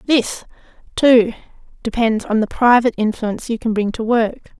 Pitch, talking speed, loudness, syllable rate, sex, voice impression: 225 Hz, 155 wpm, -17 LUFS, 5.2 syllables/s, female, very feminine, slightly young, very adult-like, very thin, slightly tensed, slightly powerful, bright, hard, clear, very fluent, raspy, cute, slightly cool, intellectual, refreshing, slightly sincere, slightly calm, friendly, reassuring, very unique, slightly elegant, wild, slightly sweet, lively, slightly kind, slightly intense, sharp, slightly modest, light